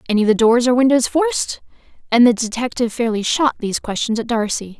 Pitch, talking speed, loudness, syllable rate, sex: 240 Hz, 200 wpm, -17 LUFS, 6.4 syllables/s, female